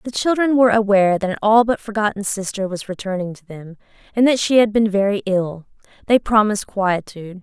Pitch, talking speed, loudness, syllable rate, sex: 205 Hz, 195 wpm, -18 LUFS, 5.9 syllables/s, female